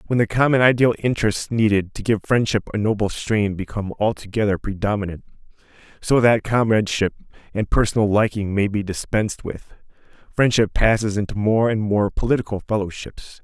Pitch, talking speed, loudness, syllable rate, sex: 105 Hz, 145 wpm, -20 LUFS, 5.6 syllables/s, male